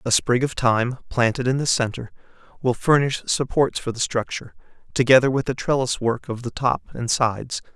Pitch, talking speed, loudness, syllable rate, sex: 125 Hz, 185 wpm, -22 LUFS, 5.4 syllables/s, male